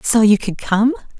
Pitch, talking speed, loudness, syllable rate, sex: 215 Hz, 200 wpm, -16 LUFS, 4.7 syllables/s, female